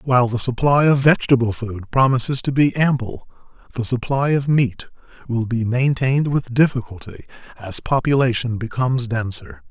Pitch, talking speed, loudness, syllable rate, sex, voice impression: 125 Hz, 140 wpm, -19 LUFS, 5.2 syllables/s, male, very masculine, very adult-like, old, very thick, tensed, powerful, slightly dark, hard, muffled, fluent, raspy, cool, intellectual, sincere, slightly calm, very mature, very friendly, reassuring, very unique, slightly elegant, very wild, sweet, lively, slightly kind, intense